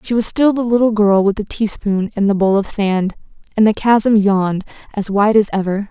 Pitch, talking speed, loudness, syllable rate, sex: 205 Hz, 225 wpm, -15 LUFS, 5.1 syllables/s, female